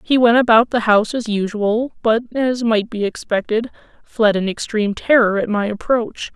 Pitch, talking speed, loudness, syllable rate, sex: 225 Hz, 180 wpm, -17 LUFS, 4.9 syllables/s, female